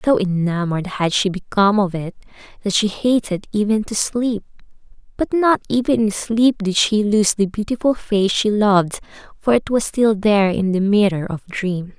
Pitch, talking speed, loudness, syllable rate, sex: 205 Hz, 180 wpm, -18 LUFS, 4.9 syllables/s, female